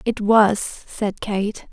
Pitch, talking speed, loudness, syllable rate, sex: 210 Hz, 140 wpm, -20 LUFS, 2.5 syllables/s, female